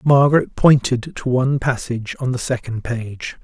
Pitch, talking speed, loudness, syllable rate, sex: 125 Hz, 155 wpm, -19 LUFS, 4.9 syllables/s, male